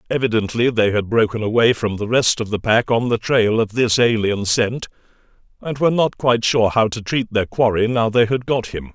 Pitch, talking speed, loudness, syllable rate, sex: 115 Hz, 220 wpm, -18 LUFS, 5.4 syllables/s, male